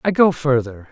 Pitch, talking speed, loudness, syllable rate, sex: 140 Hz, 195 wpm, -17 LUFS, 5.0 syllables/s, male